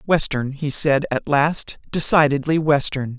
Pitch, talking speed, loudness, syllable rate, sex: 145 Hz, 130 wpm, -19 LUFS, 4.2 syllables/s, male